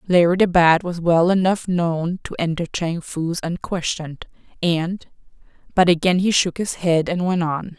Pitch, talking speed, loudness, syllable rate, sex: 175 Hz, 160 wpm, -20 LUFS, 4.4 syllables/s, female